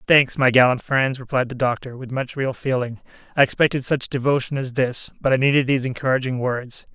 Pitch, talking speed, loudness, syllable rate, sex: 130 Hz, 200 wpm, -21 LUFS, 5.7 syllables/s, male